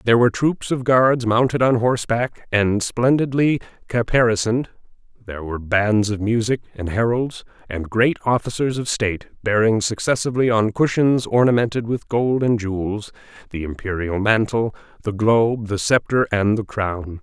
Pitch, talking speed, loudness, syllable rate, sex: 115 Hz, 145 wpm, -20 LUFS, 5.0 syllables/s, male